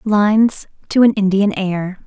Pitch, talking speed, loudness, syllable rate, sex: 200 Hz, 145 wpm, -15 LUFS, 4.2 syllables/s, female